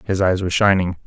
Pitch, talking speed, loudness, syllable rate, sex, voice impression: 95 Hz, 225 wpm, -18 LUFS, 6.6 syllables/s, male, very masculine, middle-aged, thick, relaxed, slightly powerful, slightly dark, soft, muffled, fluent, raspy, cool, very intellectual, slightly refreshing, very sincere, very calm, very mature, friendly, very reassuring, very unique, very elegant, wild, sweet, lively, kind, slightly modest